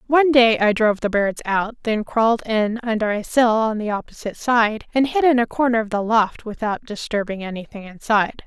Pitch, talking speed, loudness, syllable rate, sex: 225 Hz, 205 wpm, -19 LUFS, 5.5 syllables/s, female